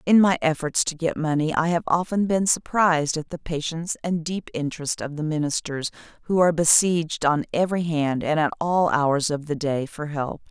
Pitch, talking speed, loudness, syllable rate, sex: 160 Hz, 200 wpm, -23 LUFS, 5.3 syllables/s, female